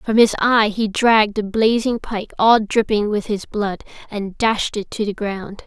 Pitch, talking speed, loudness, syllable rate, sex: 215 Hz, 200 wpm, -18 LUFS, 4.2 syllables/s, female